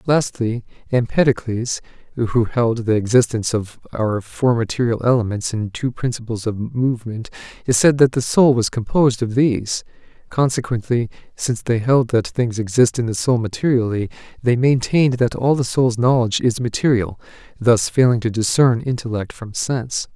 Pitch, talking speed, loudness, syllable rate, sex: 120 Hz, 150 wpm, -19 LUFS, 5.0 syllables/s, male